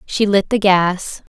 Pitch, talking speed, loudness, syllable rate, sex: 195 Hz, 180 wpm, -15 LUFS, 3.5 syllables/s, female